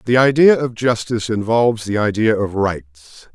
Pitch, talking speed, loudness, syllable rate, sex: 110 Hz, 160 wpm, -16 LUFS, 4.8 syllables/s, male